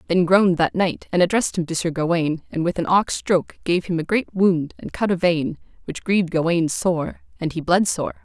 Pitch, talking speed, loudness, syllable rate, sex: 175 Hz, 235 wpm, -21 LUFS, 5.7 syllables/s, female